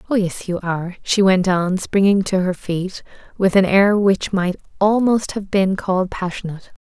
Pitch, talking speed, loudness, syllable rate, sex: 190 Hz, 185 wpm, -18 LUFS, 4.8 syllables/s, female